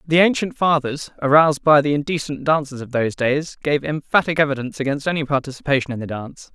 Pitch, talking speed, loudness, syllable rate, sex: 145 Hz, 185 wpm, -19 LUFS, 6.4 syllables/s, male